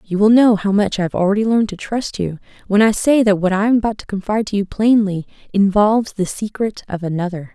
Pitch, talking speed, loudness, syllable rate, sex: 205 Hz, 240 wpm, -17 LUFS, 6.1 syllables/s, female